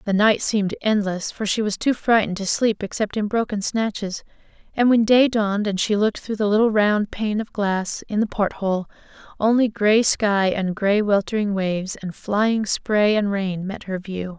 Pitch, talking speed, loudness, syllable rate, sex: 205 Hz, 200 wpm, -21 LUFS, 4.7 syllables/s, female